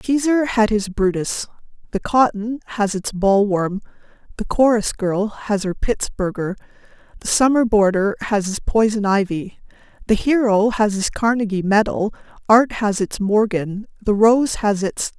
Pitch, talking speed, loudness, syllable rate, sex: 210 Hz, 140 wpm, -19 LUFS, 4.3 syllables/s, female